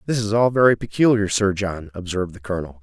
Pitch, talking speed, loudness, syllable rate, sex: 100 Hz, 215 wpm, -20 LUFS, 6.5 syllables/s, male